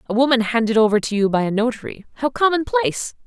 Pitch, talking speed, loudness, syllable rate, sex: 235 Hz, 200 wpm, -19 LUFS, 6.6 syllables/s, female